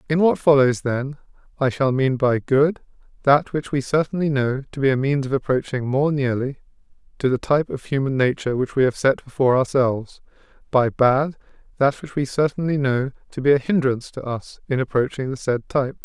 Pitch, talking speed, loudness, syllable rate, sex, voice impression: 135 Hz, 195 wpm, -21 LUFS, 5.6 syllables/s, male, very masculine, very middle-aged, very thick, tensed, slightly weak, slightly bright, soft, muffled, fluent, slightly raspy, cool, very intellectual, slightly refreshing, sincere, very calm, mature, very friendly, reassuring, unique, elegant, slightly wild, sweet, lively, kind, slightly modest